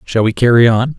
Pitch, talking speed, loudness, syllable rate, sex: 115 Hz, 245 wpm, -12 LUFS, 5.6 syllables/s, male